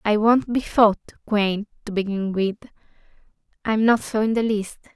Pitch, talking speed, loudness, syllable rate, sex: 215 Hz, 170 wpm, -21 LUFS, 4.6 syllables/s, female